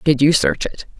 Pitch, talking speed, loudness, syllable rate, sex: 150 Hz, 240 wpm, -17 LUFS, 5.0 syllables/s, female